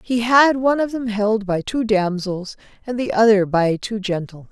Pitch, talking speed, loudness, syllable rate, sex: 215 Hz, 200 wpm, -19 LUFS, 4.9 syllables/s, female